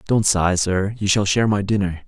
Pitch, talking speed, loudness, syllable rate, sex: 100 Hz, 230 wpm, -19 LUFS, 5.3 syllables/s, male